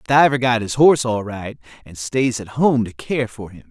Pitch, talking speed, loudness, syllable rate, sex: 115 Hz, 225 wpm, -18 LUFS, 4.9 syllables/s, male